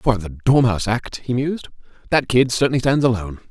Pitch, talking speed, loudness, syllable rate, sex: 120 Hz, 190 wpm, -19 LUFS, 6.1 syllables/s, male